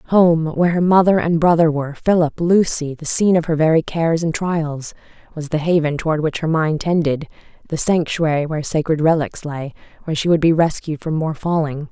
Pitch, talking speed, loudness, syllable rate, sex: 160 Hz, 185 wpm, -18 LUFS, 5.5 syllables/s, female